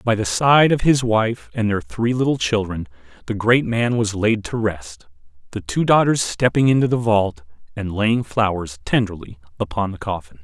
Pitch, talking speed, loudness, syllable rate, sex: 105 Hz, 185 wpm, -19 LUFS, 4.7 syllables/s, male